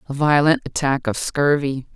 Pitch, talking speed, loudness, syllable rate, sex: 145 Hz, 155 wpm, -19 LUFS, 4.8 syllables/s, female